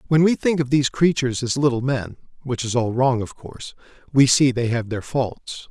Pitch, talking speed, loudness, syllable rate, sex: 130 Hz, 220 wpm, -20 LUFS, 4.5 syllables/s, male